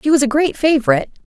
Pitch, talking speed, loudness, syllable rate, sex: 270 Hz, 235 wpm, -15 LUFS, 7.3 syllables/s, female